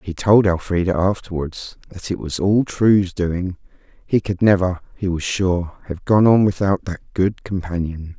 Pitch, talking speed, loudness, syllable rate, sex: 95 Hz, 170 wpm, -19 LUFS, 4.4 syllables/s, male